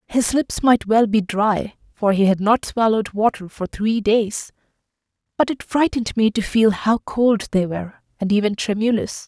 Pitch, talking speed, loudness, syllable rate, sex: 215 Hz, 180 wpm, -19 LUFS, 4.8 syllables/s, female